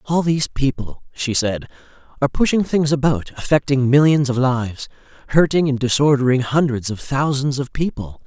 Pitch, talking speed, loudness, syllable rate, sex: 135 Hz, 150 wpm, -18 LUFS, 5.3 syllables/s, male